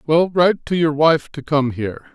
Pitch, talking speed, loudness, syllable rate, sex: 150 Hz, 225 wpm, -18 LUFS, 5.0 syllables/s, male